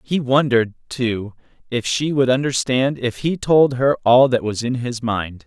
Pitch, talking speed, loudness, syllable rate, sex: 125 Hz, 185 wpm, -18 LUFS, 4.3 syllables/s, male